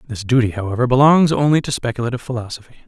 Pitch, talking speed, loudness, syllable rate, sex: 125 Hz, 165 wpm, -17 LUFS, 7.6 syllables/s, male